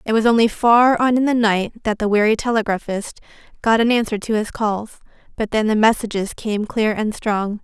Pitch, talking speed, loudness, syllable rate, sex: 220 Hz, 205 wpm, -18 LUFS, 5.1 syllables/s, female